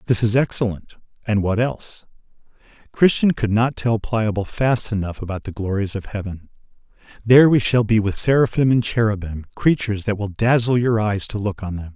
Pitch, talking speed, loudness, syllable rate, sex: 110 Hz, 180 wpm, -19 LUFS, 5.4 syllables/s, male